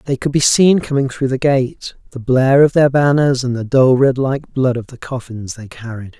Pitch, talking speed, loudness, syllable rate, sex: 130 Hz, 215 wpm, -15 LUFS, 5.0 syllables/s, male